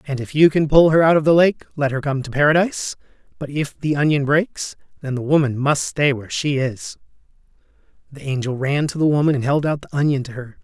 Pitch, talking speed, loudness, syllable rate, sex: 145 Hz, 230 wpm, -18 LUFS, 5.9 syllables/s, male